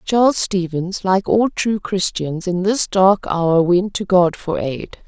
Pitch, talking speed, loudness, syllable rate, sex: 190 Hz, 175 wpm, -17 LUFS, 3.7 syllables/s, female